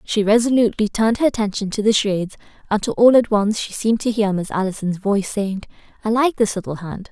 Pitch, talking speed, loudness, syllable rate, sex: 210 Hz, 210 wpm, -19 LUFS, 6.4 syllables/s, female